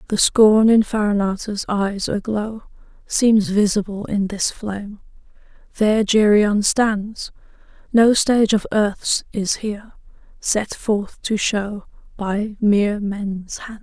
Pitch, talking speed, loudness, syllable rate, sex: 210 Hz, 120 wpm, -19 LUFS, 3.7 syllables/s, female